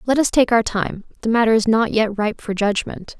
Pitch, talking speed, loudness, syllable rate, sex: 220 Hz, 245 wpm, -18 LUFS, 5.2 syllables/s, female